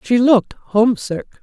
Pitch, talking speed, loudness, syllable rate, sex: 225 Hz, 125 wpm, -16 LUFS, 5.1 syllables/s, female